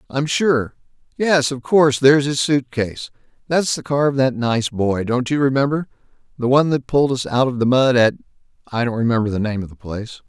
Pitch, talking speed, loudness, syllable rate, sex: 130 Hz, 180 wpm, -18 LUFS, 5.7 syllables/s, male